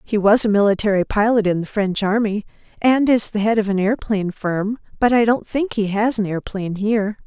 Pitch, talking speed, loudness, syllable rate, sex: 210 Hz, 215 wpm, -19 LUFS, 5.8 syllables/s, female